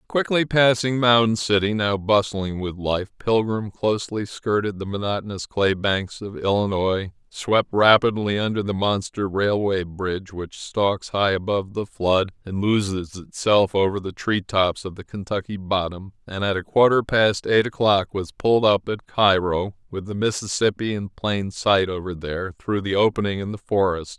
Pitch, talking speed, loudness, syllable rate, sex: 100 Hz, 165 wpm, -22 LUFS, 4.6 syllables/s, male